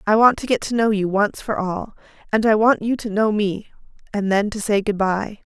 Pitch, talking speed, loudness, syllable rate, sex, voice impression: 210 Hz, 250 wpm, -20 LUFS, 5.1 syllables/s, female, feminine, adult-like, tensed, powerful, bright, clear, fluent, intellectual, friendly, lively, slightly sharp